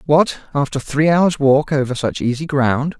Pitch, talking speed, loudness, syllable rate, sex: 145 Hz, 180 wpm, -17 LUFS, 4.5 syllables/s, male